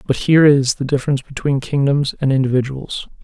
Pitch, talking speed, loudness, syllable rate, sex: 135 Hz, 165 wpm, -16 LUFS, 6.1 syllables/s, male